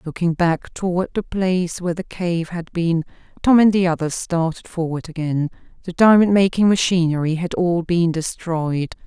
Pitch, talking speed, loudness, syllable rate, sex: 175 Hz, 165 wpm, -19 LUFS, 4.8 syllables/s, female